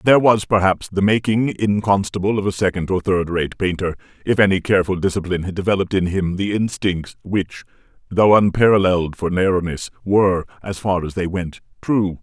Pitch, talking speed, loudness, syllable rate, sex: 95 Hz, 175 wpm, -19 LUFS, 5.5 syllables/s, male